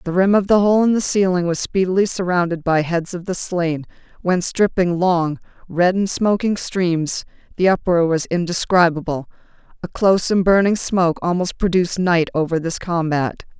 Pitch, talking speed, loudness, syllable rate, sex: 180 Hz, 170 wpm, -18 LUFS, 5.0 syllables/s, female